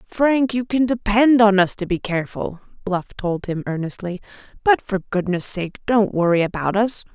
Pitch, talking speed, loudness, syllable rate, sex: 205 Hz, 175 wpm, -20 LUFS, 4.7 syllables/s, female